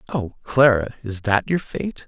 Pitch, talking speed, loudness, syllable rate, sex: 120 Hz, 175 wpm, -21 LUFS, 4.0 syllables/s, male